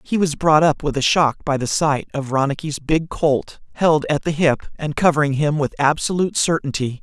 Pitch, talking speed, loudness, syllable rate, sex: 150 Hz, 205 wpm, -19 LUFS, 5.1 syllables/s, male